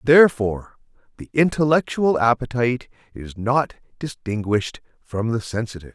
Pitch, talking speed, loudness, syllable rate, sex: 125 Hz, 100 wpm, -21 LUFS, 5.3 syllables/s, male